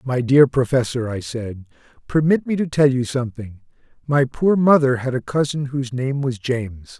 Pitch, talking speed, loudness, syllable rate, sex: 130 Hz, 180 wpm, -19 LUFS, 5.0 syllables/s, male